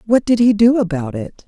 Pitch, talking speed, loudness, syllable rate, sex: 205 Hz, 245 wpm, -15 LUFS, 5.3 syllables/s, female